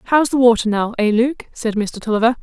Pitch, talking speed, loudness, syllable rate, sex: 230 Hz, 225 wpm, -17 LUFS, 5.3 syllables/s, female